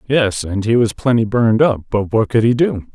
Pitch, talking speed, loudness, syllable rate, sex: 115 Hz, 245 wpm, -16 LUFS, 5.3 syllables/s, male